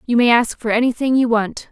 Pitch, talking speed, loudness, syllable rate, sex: 235 Hz, 245 wpm, -16 LUFS, 5.6 syllables/s, female